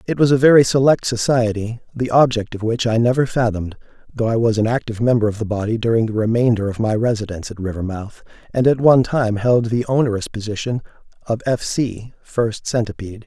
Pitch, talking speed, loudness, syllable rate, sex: 115 Hz, 195 wpm, -18 LUFS, 6.0 syllables/s, male